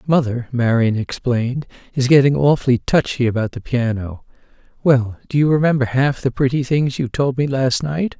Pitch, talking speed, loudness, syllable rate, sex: 130 Hz, 170 wpm, -18 LUFS, 5.1 syllables/s, male